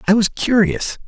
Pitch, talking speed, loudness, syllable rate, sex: 195 Hz, 165 wpm, -17 LUFS, 4.7 syllables/s, male